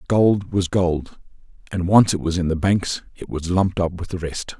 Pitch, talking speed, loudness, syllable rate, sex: 90 Hz, 220 wpm, -21 LUFS, 4.7 syllables/s, male